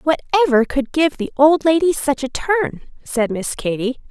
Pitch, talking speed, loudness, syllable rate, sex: 285 Hz, 175 wpm, -18 LUFS, 4.4 syllables/s, female